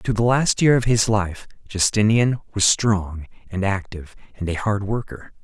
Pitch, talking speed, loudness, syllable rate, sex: 105 Hz, 175 wpm, -20 LUFS, 4.6 syllables/s, male